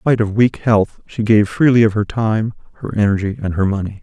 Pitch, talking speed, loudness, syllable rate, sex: 105 Hz, 240 wpm, -16 LUFS, 6.0 syllables/s, male